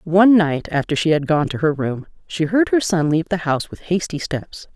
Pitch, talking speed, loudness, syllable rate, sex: 165 Hz, 240 wpm, -19 LUFS, 5.4 syllables/s, female